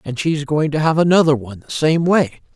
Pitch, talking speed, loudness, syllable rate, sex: 150 Hz, 235 wpm, -17 LUFS, 5.6 syllables/s, female